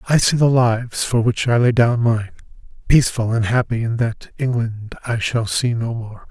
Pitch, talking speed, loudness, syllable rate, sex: 115 Hz, 200 wpm, -18 LUFS, 4.8 syllables/s, male